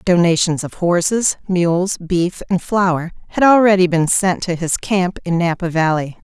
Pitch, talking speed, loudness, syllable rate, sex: 180 Hz, 160 wpm, -16 LUFS, 4.2 syllables/s, female